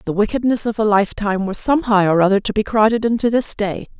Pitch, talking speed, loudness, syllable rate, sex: 210 Hz, 225 wpm, -17 LUFS, 6.6 syllables/s, female